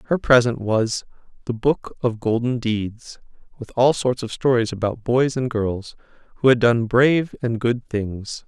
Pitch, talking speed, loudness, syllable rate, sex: 120 Hz, 170 wpm, -21 LUFS, 4.2 syllables/s, male